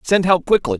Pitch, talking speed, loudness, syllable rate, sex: 165 Hz, 230 wpm, -16 LUFS, 5.8 syllables/s, male